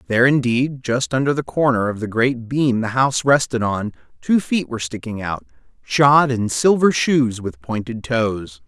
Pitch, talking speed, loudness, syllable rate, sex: 125 Hz, 180 wpm, -19 LUFS, 4.6 syllables/s, male